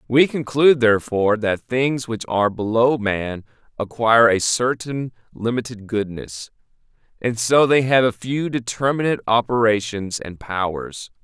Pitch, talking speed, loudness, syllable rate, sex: 115 Hz, 130 wpm, -19 LUFS, 4.7 syllables/s, male